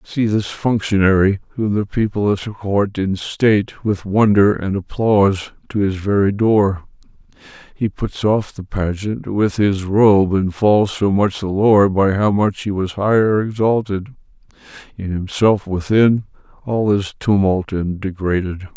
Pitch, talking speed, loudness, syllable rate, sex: 100 Hz, 145 wpm, -17 LUFS, 4.1 syllables/s, male